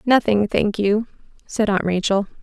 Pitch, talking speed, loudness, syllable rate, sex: 210 Hz, 150 wpm, -19 LUFS, 4.4 syllables/s, female